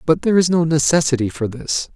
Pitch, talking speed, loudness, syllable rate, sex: 155 Hz, 215 wpm, -17 LUFS, 6.1 syllables/s, male